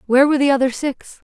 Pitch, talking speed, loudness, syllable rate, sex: 270 Hz, 230 wpm, -17 LUFS, 7.5 syllables/s, female